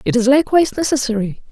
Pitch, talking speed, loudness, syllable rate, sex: 265 Hz, 160 wpm, -16 LUFS, 7.4 syllables/s, female